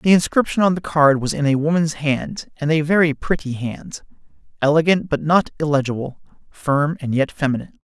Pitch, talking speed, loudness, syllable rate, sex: 150 Hz, 170 wpm, -19 LUFS, 5.4 syllables/s, male